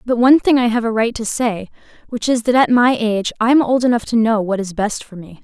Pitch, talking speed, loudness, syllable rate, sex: 230 Hz, 285 wpm, -16 LUFS, 6.0 syllables/s, female